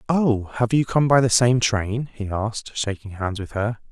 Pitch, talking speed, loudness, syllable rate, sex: 115 Hz, 215 wpm, -21 LUFS, 4.5 syllables/s, male